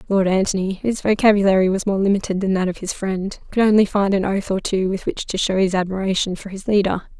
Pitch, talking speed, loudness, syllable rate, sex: 195 Hz, 235 wpm, -19 LUFS, 6.2 syllables/s, female